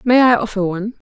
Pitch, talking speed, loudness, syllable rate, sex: 220 Hz, 225 wpm, -16 LUFS, 6.9 syllables/s, female